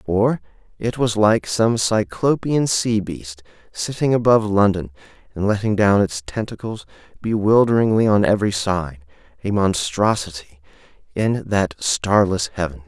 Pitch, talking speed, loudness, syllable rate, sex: 100 Hz, 120 wpm, -19 LUFS, 4.5 syllables/s, male